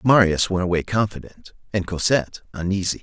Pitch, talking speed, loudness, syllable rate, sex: 95 Hz, 140 wpm, -21 LUFS, 5.7 syllables/s, male